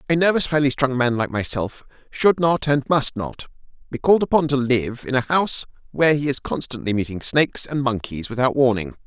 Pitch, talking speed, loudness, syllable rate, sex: 135 Hz, 200 wpm, -20 LUFS, 5.7 syllables/s, male